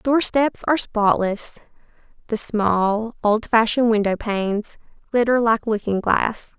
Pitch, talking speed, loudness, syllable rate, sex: 220 Hz, 130 wpm, -20 LUFS, 4.3 syllables/s, female